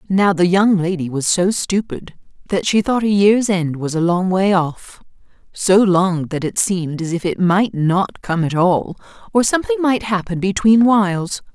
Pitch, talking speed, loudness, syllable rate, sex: 185 Hz, 185 wpm, -17 LUFS, 4.5 syllables/s, female